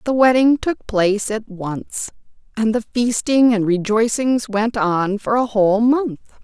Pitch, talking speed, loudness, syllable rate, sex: 225 Hz, 160 wpm, -18 LUFS, 4.1 syllables/s, female